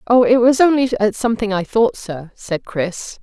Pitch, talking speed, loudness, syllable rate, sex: 220 Hz, 205 wpm, -16 LUFS, 4.8 syllables/s, female